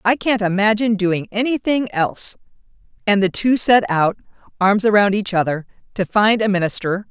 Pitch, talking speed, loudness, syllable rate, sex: 205 Hz, 160 wpm, -18 LUFS, 5.2 syllables/s, female